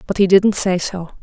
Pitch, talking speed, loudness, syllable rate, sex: 185 Hz, 245 wpm, -16 LUFS, 4.9 syllables/s, female